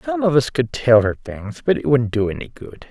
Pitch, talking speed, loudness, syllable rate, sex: 115 Hz, 290 wpm, -18 LUFS, 5.4 syllables/s, male